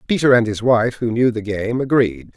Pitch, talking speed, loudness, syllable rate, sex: 115 Hz, 230 wpm, -17 LUFS, 5.1 syllables/s, male